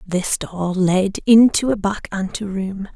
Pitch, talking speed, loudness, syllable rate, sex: 195 Hz, 140 wpm, -18 LUFS, 3.7 syllables/s, female